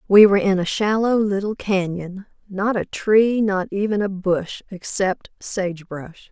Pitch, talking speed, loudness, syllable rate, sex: 195 Hz, 150 wpm, -20 LUFS, 4.0 syllables/s, female